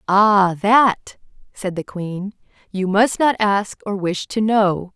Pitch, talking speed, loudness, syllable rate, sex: 200 Hz, 155 wpm, -18 LUFS, 3.3 syllables/s, female